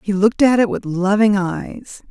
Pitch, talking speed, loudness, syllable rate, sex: 205 Hz, 200 wpm, -17 LUFS, 4.6 syllables/s, female